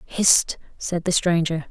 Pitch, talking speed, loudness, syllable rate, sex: 170 Hz, 140 wpm, -20 LUFS, 3.7 syllables/s, female